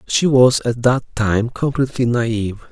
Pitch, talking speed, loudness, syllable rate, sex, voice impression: 120 Hz, 155 wpm, -17 LUFS, 4.6 syllables/s, male, masculine, slightly young, adult-like, thick, relaxed, weak, dark, very soft, muffled, slightly halting, slightly raspy, cool, intellectual, slightly refreshing, very sincere, very calm, very friendly, reassuring, unique, elegant, slightly wild, slightly sweet, slightly lively, very kind, very modest, light